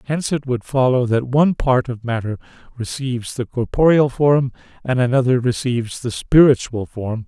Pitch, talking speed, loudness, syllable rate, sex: 125 Hz, 155 wpm, -18 LUFS, 5.2 syllables/s, male